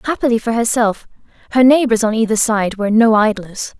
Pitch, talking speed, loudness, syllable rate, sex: 225 Hz, 175 wpm, -14 LUFS, 5.7 syllables/s, female